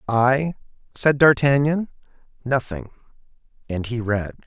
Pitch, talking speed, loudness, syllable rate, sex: 130 Hz, 95 wpm, -20 LUFS, 4.1 syllables/s, male